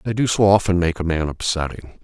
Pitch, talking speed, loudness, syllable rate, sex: 90 Hz, 235 wpm, -19 LUFS, 5.8 syllables/s, male